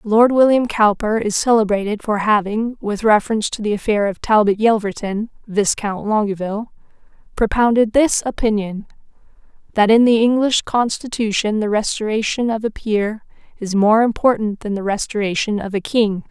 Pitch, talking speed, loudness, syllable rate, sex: 215 Hz, 145 wpm, -17 LUFS, 5.1 syllables/s, female